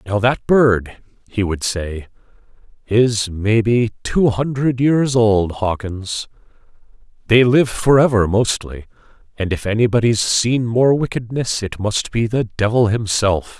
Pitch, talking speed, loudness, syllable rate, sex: 110 Hz, 125 wpm, -17 LUFS, 3.9 syllables/s, male